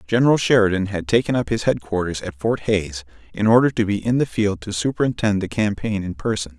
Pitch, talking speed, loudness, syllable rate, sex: 105 Hz, 210 wpm, -20 LUFS, 5.8 syllables/s, male